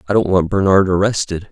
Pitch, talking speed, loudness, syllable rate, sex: 95 Hz, 200 wpm, -15 LUFS, 6.0 syllables/s, male